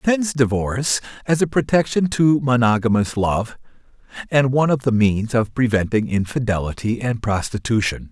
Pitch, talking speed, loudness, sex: 125 Hz, 135 wpm, -19 LUFS, male